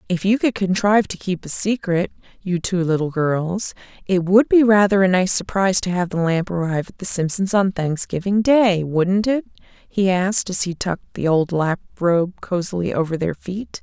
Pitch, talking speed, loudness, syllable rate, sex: 185 Hz, 185 wpm, -19 LUFS, 5.0 syllables/s, female